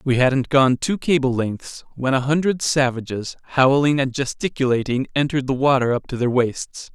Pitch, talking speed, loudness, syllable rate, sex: 135 Hz, 175 wpm, -20 LUFS, 5.0 syllables/s, male